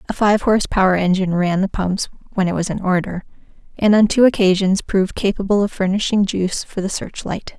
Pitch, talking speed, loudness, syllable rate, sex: 195 Hz, 205 wpm, -18 LUFS, 5.9 syllables/s, female